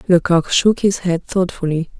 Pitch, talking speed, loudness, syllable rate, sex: 180 Hz, 150 wpm, -17 LUFS, 4.6 syllables/s, female